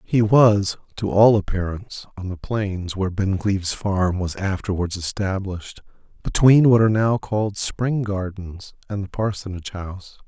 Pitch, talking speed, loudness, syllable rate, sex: 100 Hz, 145 wpm, -21 LUFS, 4.8 syllables/s, male